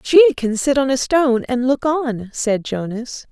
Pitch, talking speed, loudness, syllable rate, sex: 255 Hz, 200 wpm, -18 LUFS, 4.1 syllables/s, female